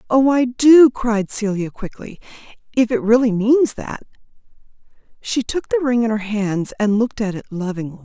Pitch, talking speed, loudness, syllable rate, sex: 225 Hz, 170 wpm, -17 LUFS, 4.8 syllables/s, female